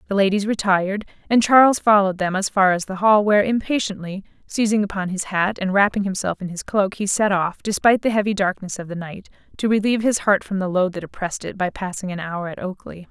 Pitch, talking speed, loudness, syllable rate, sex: 195 Hz, 230 wpm, -20 LUFS, 6.1 syllables/s, female